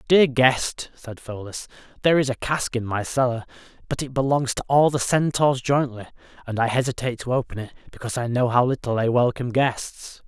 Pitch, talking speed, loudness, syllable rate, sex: 125 Hz, 195 wpm, -22 LUFS, 5.5 syllables/s, male